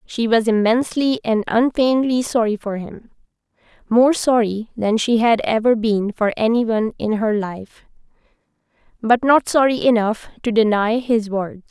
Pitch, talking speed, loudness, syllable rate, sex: 230 Hz, 145 wpm, -18 LUFS, 4.7 syllables/s, female